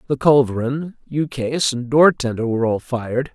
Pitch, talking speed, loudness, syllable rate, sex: 130 Hz, 160 wpm, -19 LUFS, 5.2 syllables/s, male